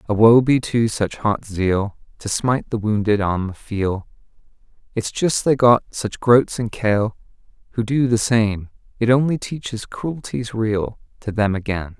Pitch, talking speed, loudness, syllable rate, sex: 110 Hz, 170 wpm, -20 LUFS, 4.2 syllables/s, male